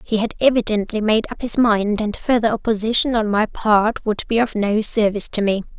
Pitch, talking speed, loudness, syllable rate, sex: 215 Hz, 210 wpm, -19 LUFS, 5.4 syllables/s, female